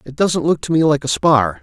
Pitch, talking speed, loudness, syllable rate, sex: 145 Hz, 295 wpm, -16 LUFS, 5.3 syllables/s, male